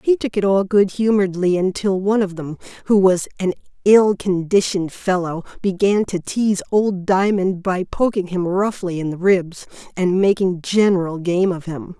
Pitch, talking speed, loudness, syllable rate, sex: 190 Hz, 170 wpm, -18 LUFS, 4.8 syllables/s, female